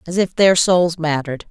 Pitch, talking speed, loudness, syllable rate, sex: 170 Hz, 200 wpm, -16 LUFS, 5.2 syllables/s, female